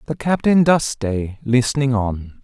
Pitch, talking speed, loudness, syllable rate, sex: 125 Hz, 150 wpm, -18 LUFS, 4.1 syllables/s, male